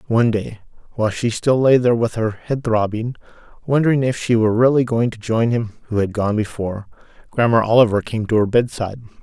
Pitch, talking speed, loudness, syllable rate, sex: 115 Hz, 195 wpm, -18 LUFS, 6.0 syllables/s, male